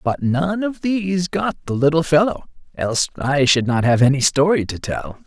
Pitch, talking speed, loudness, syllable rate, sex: 155 Hz, 195 wpm, -18 LUFS, 5.0 syllables/s, male